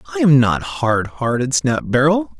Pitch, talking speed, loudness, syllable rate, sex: 135 Hz, 175 wpm, -17 LUFS, 4.4 syllables/s, male